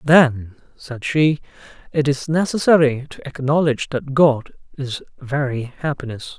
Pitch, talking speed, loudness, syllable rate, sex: 140 Hz, 120 wpm, -19 LUFS, 4.3 syllables/s, male